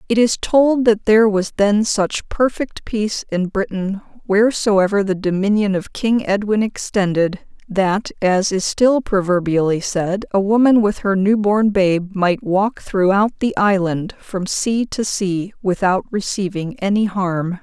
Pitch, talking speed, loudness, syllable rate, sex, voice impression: 200 Hz, 155 wpm, -17 LUFS, 4.1 syllables/s, female, feminine, middle-aged, tensed, powerful, slightly bright, slightly soft, slightly muffled, intellectual, calm, friendly, reassuring, elegant, slightly lively, kind, slightly modest